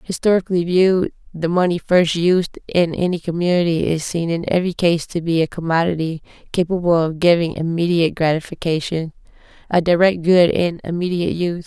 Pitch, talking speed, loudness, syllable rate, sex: 170 Hz, 150 wpm, -18 LUFS, 5.7 syllables/s, female